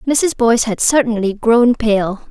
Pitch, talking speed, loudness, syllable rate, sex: 230 Hz, 155 wpm, -14 LUFS, 4.0 syllables/s, female